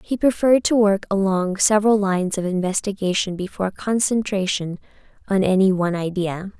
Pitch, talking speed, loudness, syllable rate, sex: 195 Hz, 135 wpm, -20 LUFS, 5.6 syllables/s, female